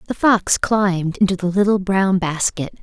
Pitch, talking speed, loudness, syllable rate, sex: 190 Hz, 170 wpm, -18 LUFS, 4.7 syllables/s, female